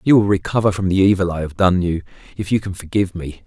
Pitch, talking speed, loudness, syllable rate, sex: 95 Hz, 260 wpm, -18 LUFS, 6.6 syllables/s, male